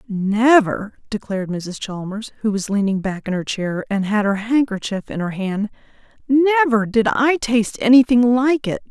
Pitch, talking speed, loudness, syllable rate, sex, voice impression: 220 Hz, 170 wpm, -18 LUFS, 4.6 syllables/s, female, feminine, adult-like, calm, elegant, slightly kind